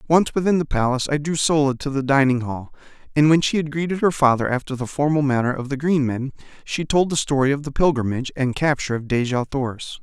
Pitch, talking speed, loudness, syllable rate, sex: 140 Hz, 225 wpm, -21 LUFS, 6.2 syllables/s, male